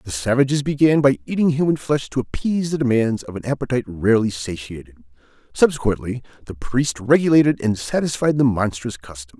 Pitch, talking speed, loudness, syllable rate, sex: 125 Hz, 160 wpm, -19 LUFS, 5.9 syllables/s, male